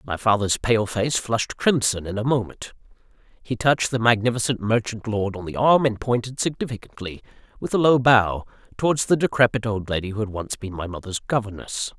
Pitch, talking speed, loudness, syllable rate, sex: 115 Hz, 185 wpm, -22 LUFS, 5.5 syllables/s, male